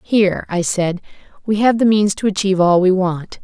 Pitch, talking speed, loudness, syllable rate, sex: 195 Hz, 210 wpm, -16 LUFS, 5.2 syllables/s, female